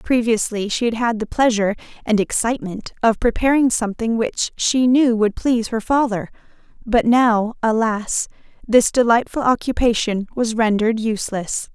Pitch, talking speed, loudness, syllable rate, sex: 225 Hz, 140 wpm, -18 LUFS, 4.9 syllables/s, female